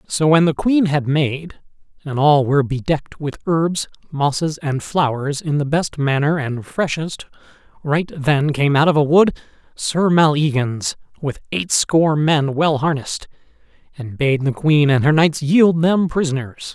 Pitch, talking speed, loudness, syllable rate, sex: 150 Hz, 160 wpm, -18 LUFS, 4.4 syllables/s, male